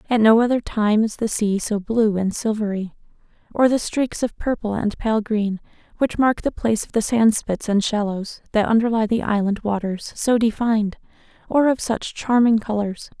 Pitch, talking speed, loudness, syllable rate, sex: 220 Hz, 185 wpm, -20 LUFS, 4.9 syllables/s, female